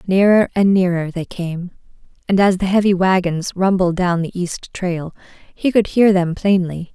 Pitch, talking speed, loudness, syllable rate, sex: 185 Hz, 175 wpm, -17 LUFS, 4.4 syllables/s, female